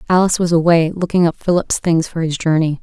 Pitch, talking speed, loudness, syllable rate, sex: 165 Hz, 215 wpm, -16 LUFS, 6.1 syllables/s, female